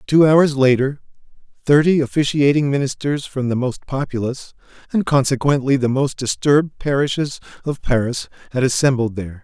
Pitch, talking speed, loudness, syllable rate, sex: 135 Hz, 135 wpm, -18 LUFS, 5.3 syllables/s, male